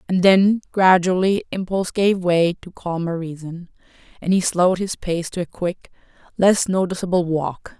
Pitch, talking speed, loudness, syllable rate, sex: 180 Hz, 155 wpm, -19 LUFS, 4.7 syllables/s, female